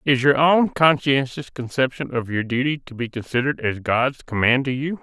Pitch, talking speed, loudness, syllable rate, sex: 135 Hz, 190 wpm, -20 LUFS, 5.1 syllables/s, male